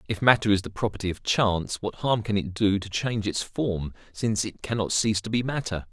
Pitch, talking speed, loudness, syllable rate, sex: 105 Hz, 245 wpm, -26 LUFS, 5.8 syllables/s, male